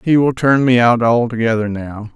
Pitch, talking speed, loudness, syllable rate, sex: 120 Hz, 195 wpm, -14 LUFS, 4.9 syllables/s, male